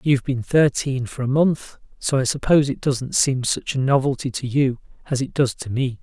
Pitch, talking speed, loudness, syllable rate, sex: 135 Hz, 220 wpm, -21 LUFS, 5.2 syllables/s, male